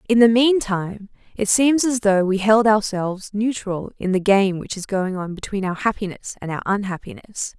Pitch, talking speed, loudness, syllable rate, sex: 205 Hz, 190 wpm, -20 LUFS, 5.0 syllables/s, female